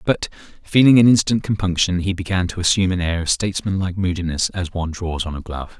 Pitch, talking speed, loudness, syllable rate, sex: 90 Hz, 215 wpm, -19 LUFS, 6.4 syllables/s, male